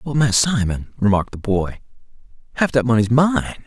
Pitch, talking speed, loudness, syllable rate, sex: 120 Hz, 165 wpm, -18 LUFS, 5.2 syllables/s, male